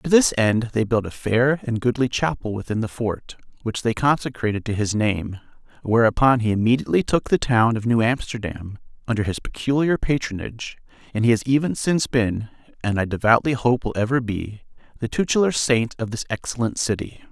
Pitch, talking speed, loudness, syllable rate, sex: 120 Hz, 180 wpm, -21 LUFS, 5.5 syllables/s, male